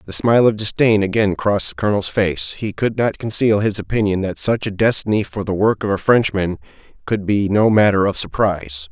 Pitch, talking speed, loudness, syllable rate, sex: 100 Hz, 210 wpm, -17 LUFS, 5.6 syllables/s, male